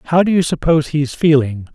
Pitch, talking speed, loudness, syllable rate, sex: 150 Hz, 240 wpm, -15 LUFS, 6.0 syllables/s, male